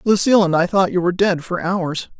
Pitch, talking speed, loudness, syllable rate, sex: 185 Hz, 245 wpm, -17 LUFS, 5.9 syllables/s, female